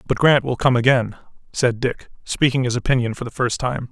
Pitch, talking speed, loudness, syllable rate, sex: 125 Hz, 215 wpm, -19 LUFS, 5.5 syllables/s, male